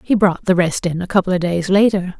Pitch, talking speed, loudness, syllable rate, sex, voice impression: 185 Hz, 275 wpm, -17 LUFS, 5.8 syllables/s, female, feminine, adult-like, tensed, powerful, soft, raspy, intellectual, elegant, lively, slightly sharp